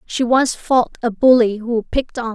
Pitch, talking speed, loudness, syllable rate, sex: 235 Hz, 205 wpm, -17 LUFS, 4.6 syllables/s, female